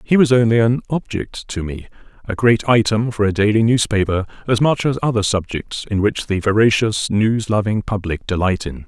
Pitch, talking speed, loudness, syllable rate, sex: 110 Hz, 185 wpm, -18 LUFS, 5.1 syllables/s, male